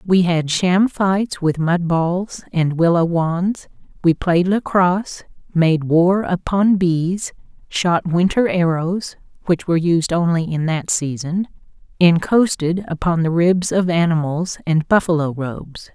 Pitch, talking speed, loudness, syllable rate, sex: 175 Hz, 140 wpm, -18 LUFS, 3.3 syllables/s, female